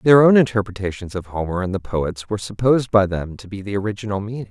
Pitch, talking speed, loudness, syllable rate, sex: 105 Hz, 225 wpm, -20 LUFS, 6.5 syllables/s, male